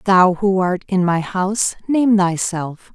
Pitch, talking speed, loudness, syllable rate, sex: 190 Hz, 165 wpm, -17 LUFS, 3.8 syllables/s, female